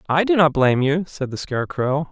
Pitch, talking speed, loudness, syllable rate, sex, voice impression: 150 Hz, 225 wpm, -19 LUFS, 5.8 syllables/s, male, masculine, adult-like, unique, slightly intense